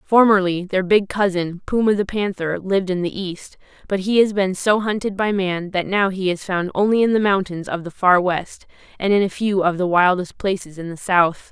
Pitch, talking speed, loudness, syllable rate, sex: 190 Hz, 225 wpm, -19 LUFS, 5.0 syllables/s, female